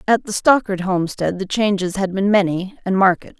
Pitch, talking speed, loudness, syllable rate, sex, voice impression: 195 Hz, 195 wpm, -18 LUFS, 5.4 syllables/s, female, very feminine, adult-like, slightly fluent, intellectual, elegant